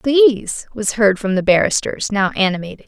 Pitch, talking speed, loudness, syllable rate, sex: 210 Hz, 165 wpm, -17 LUFS, 5.1 syllables/s, female